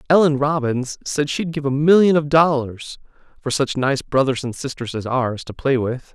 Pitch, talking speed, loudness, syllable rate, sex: 140 Hz, 195 wpm, -19 LUFS, 4.7 syllables/s, male